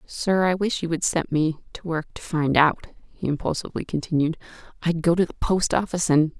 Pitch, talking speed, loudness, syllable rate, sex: 165 Hz, 205 wpm, -23 LUFS, 5.5 syllables/s, female